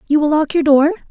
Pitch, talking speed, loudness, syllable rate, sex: 305 Hz, 270 wpm, -14 LUFS, 6.4 syllables/s, female